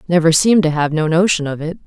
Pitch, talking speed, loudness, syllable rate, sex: 165 Hz, 260 wpm, -15 LUFS, 6.6 syllables/s, female